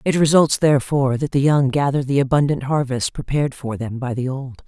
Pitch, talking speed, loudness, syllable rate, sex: 135 Hz, 205 wpm, -19 LUFS, 5.7 syllables/s, female